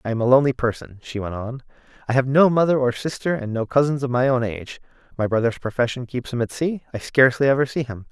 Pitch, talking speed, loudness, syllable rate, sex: 125 Hz, 245 wpm, -21 LUFS, 6.5 syllables/s, male